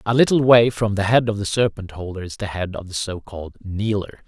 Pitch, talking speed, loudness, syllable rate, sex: 105 Hz, 240 wpm, -20 LUFS, 5.8 syllables/s, male